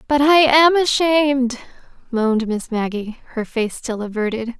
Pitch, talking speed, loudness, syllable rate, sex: 255 Hz, 145 wpm, -18 LUFS, 4.5 syllables/s, female